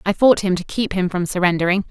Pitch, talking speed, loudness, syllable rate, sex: 190 Hz, 250 wpm, -18 LUFS, 6.2 syllables/s, female